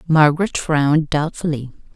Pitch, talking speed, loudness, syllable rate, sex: 155 Hz, 90 wpm, -18 LUFS, 5.0 syllables/s, female